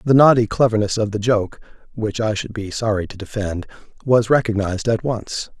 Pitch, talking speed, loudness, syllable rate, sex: 110 Hz, 180 wpm, -19 LUFS, 4.1 syllables/s, male